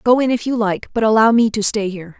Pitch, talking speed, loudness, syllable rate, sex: 220 Hz, 300 wpm, -16 LUFS, 6.2 syllables/s, female